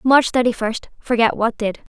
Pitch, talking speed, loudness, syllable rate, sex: 235 Hz, 155 wpm, -19 LUFS, 4.9 syllables/s, female